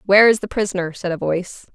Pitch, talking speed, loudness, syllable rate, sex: 190 Hz, 240 wpm, -19 LUFS, 7.1 syllables/s, female